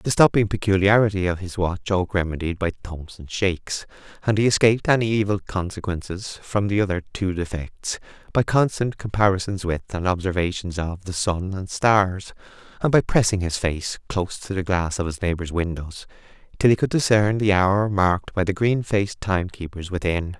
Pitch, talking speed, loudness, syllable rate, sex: 95 Hz, 175 wpm, -22 LUFS, 5.2 syllables/s, male